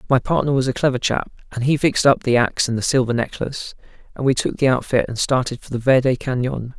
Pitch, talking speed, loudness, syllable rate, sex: 130 Hz, 240 wpm, -19 LUFS, 6.4 syllables/s, male